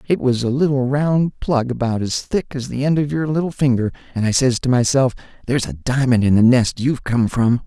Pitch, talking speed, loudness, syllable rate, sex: 130 Hz, 235 wpm, -18 LUFS, 5.5 syllables/s, male